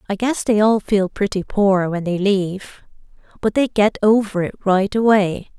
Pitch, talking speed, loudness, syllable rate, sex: 200 Hz, 185 wpm, -18 LUFS, 4.5 syllables/s, female